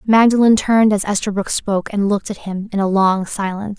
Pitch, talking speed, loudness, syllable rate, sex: 205 Hz, 205 wpm, -17 LUFS, 6.0 syllables/s, female